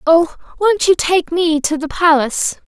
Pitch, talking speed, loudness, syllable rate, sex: 330 Hz, 180 wpm, -15 LUFS, 4.4 syllables/s, female